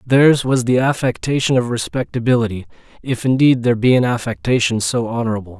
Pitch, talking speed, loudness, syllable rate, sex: 120 Hz, 140 wpm, -17 LUFS, 5.9 syllables/s, male